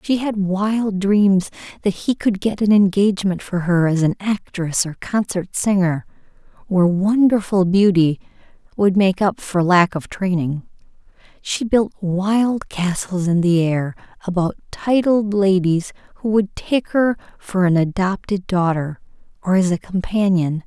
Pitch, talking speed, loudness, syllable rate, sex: 190 Hz, 145 wpm, -18 LUFS, 4.2 syllables/s, female